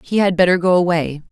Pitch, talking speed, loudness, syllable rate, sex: 175 Hz, 230 wpm, -16 LUFS, 6.1 syllables/s, female